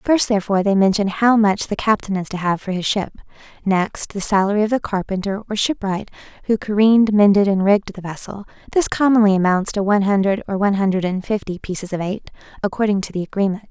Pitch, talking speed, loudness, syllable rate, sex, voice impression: 200 Hz, 205 wpm, -18 LUFS, 6.2 syllables/s, female, feminine, adult-like, tensed, slightly powerful, bright, soft, fluent, cute, slightly refreshing, calm, friendly, reassuring, elegant, slightly sweet, lively